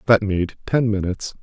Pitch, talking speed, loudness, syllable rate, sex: 105 Hz, 170 wpm, -21 LUFS, 5.4 syllables/s, male